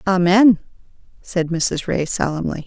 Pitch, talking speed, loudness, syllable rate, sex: 180 Hz, 110 wpm, -18 LUFS, 4.2 syllables/s, female